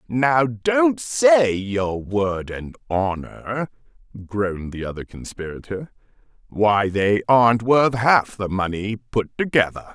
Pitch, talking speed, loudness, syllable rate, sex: 115 Hz, 120 wpm, -20 LUFS, 3.6 syllables/s, male